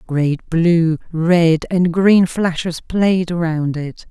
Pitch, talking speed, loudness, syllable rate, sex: 170 Hz, 130 wpm, -16 LUFS, 2.9 syllables/s, female